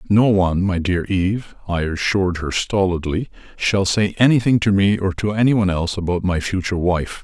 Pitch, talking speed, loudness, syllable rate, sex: 95 Hz, 190 wpm, -19 LUFS, 5.6 syllables/s, male